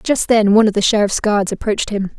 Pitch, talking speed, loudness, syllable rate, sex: 210 Hz, 245 wpm, -15 LUFS, 6.4 syllables/s, female